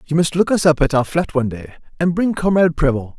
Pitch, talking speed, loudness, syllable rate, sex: 155 Hz, 265 wpm, -17 LUFS, 6.5 syllables/s, male